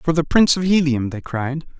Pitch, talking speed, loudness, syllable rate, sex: 150 Hz, 235 wpm, -18 LUFS, 5.4 syllables/s, male